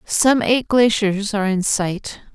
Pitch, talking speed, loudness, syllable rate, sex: 210 Hz, 155 wpm, -18 LUFS, 3.7 syllables/s, female